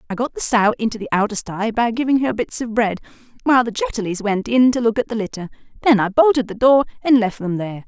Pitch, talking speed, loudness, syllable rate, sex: 225 Hz, 250 wpm, -18 LUFS, 6.4 syllables/s, female